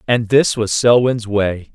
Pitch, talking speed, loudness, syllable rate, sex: 115 Hz, 170 wpm, -15 LUFS, 3.8 syllables/s, male